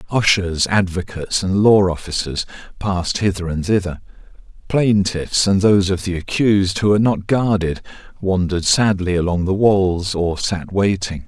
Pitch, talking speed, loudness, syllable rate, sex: 95 Hz, 145 wpm, -18 LUFS, 4.9 syllables/s, male